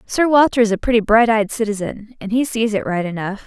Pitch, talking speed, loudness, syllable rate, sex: 220 Hz, 240 wpm, -17 LUFS, 5.7 syllables/s, female